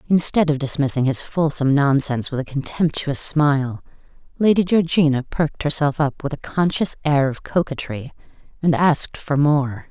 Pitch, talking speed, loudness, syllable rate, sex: 145 Hz, 150 wpm, -19 LUFS, 5.1 syllables/s, female